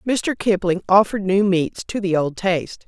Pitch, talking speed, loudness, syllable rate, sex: 190 Hz, 190 wpm, -19 LUFS, 5.0 syllables/s, female